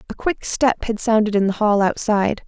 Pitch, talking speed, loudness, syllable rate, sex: 215 Hz, 220 wpm, -19 LUFS, 5.3 syllables/s, female